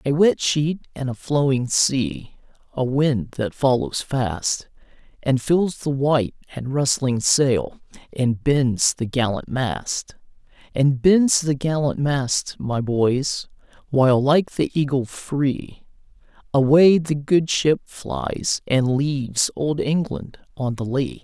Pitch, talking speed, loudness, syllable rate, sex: 135 Hz, 135 wpm, -21 LUFS, 3.3 syllables/s, male